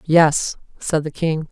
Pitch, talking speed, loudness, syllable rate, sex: 160 Hz, 160 wpm, -20 LUFS, 3.3 syllables/s, female